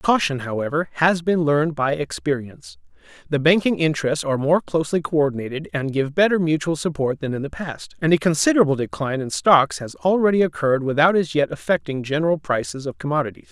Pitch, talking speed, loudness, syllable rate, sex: 145 Hz, 180 wpm, -20 LUFS, 6.1 syllables/s, male